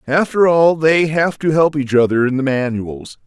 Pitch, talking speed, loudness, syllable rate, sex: 145 Hz, 200 wpm, -15 LUFS, 4.5 syllables/s, male